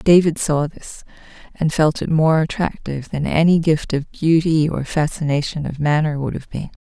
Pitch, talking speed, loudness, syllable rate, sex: 155 Hz, 175 wpm, -19 LUFS, 4.8 syllables/s, female